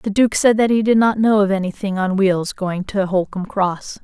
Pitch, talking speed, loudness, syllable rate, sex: 200 Hz, 240 wpm, -17 LUFS, 5.0 syllables/s, female